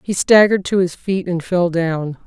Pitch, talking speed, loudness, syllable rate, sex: 180 Hz, 210 wpm, -16 LUFS, 4.7 syllables/s, female